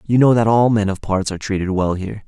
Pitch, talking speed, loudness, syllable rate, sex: 105 Hz, 290 wpm, -17 LUFS, 6.5 syllables/s, male